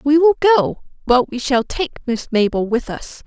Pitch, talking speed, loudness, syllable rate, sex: 265 Hz, 200 wpm, -17 LUFS, 4.4 syllables/s, female